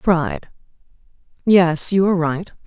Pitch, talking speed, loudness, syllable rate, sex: 170 Hz, 90 wpm, -18 LUFS, 4.4 syllables/s, female